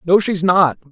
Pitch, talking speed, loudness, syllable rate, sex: 180 Hz, 200 wpm, -15 LUFS, 4.2 syllables/s, male